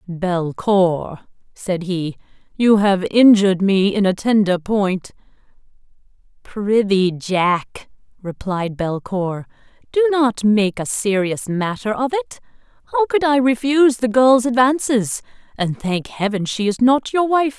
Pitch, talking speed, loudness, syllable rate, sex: 215 Hz, 130 wpm, -18 LUFS, 3.8 syllables/s, female